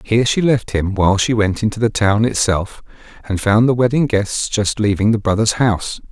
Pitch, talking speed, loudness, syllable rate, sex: 105 Hz, 205 wpm, -16 LUFS, 5.3 syllables/s, male